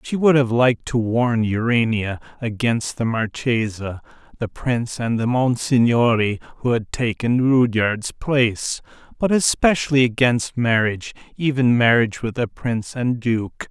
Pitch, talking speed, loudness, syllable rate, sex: 120 Hz, 135 wpm, -20 LUFS, 4.4 syllables/s, male